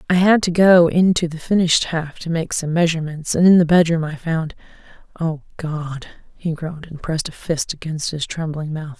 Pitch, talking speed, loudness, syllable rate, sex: 165 Hz, 195 wpm, -19 LUFS, 5.3 syllables/s, female